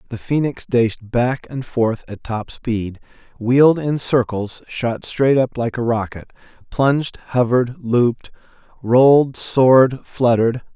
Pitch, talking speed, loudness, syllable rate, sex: 125 Hz, 125 wpm, -18 LUFS, 4.1 syllables/s, male